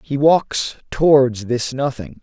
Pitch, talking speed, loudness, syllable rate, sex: 130 Hz, 135 wpm, -17 LUFS, 4.0 syllables/s, male